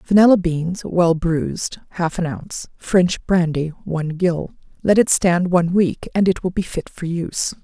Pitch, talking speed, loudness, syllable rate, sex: 175 Hz, 180 wpm, -19 LUFS, 4.5 syllables/s, female